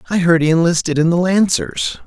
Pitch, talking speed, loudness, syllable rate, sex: 160 Hz, 205 wpm, -15 LUFS, 5.6 syllables/s, male